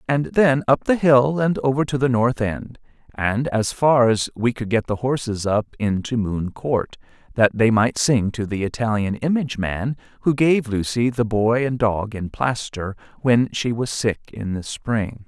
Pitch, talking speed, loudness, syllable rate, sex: 115 Hz, 190 wpm, -21 LUFS, 4.3 syllables/s, male